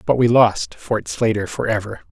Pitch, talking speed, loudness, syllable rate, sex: 110 Hz, 170 wpm, -19 LUFS, 4.7 syllables/s, male